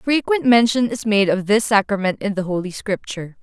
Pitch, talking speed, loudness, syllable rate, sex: 210 Hz, 195 wpm, -18 LUFS, 5.3 syllables/s, female